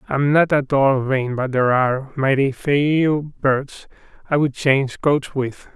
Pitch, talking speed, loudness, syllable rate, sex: 135 Hz, 165 wpm, -19 LUFS, 3.9 syllables/s, male